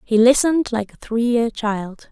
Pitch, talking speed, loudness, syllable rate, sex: 235 Hz, 200 wpm, -19 LUFS, 4.6 syllables/s, female